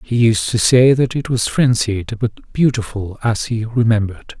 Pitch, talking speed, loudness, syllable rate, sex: 115 Hz, 175 wpm, -16 LUFS, 4.5 syllables/s, male